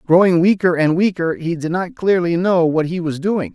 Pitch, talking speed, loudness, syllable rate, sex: 175 Hz, 220 wpm, -17 LUFS, 5.0 syllables/s, male